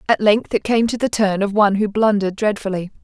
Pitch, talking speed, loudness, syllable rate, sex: 205 Hz, 235 wpm, -18 LUFS, 6.1 syllables/s, female